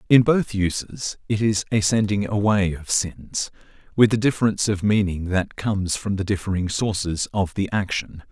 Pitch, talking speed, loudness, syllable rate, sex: 100 Hz, 175 wpm, -22 LUFS, 4.9 syllables/s, male